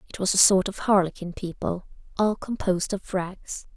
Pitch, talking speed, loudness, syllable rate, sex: 190 Hz, 175 wpm, -24 LUFS, 5.0 syllables/s, female